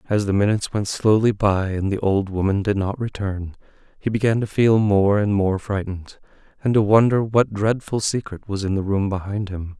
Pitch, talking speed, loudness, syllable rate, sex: 100 Hz, 200 wpm, -21 LUFS, 5.2 syllables/s, male